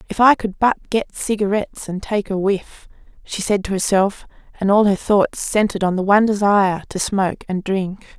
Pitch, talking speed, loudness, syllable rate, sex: 200 Hz, 200 wpm, -18 LUFS, 5.1 syllables/s, female